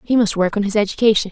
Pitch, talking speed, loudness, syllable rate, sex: 210 Hz, 275 wpm, -17 LUFS, 7.1 syllables/s, female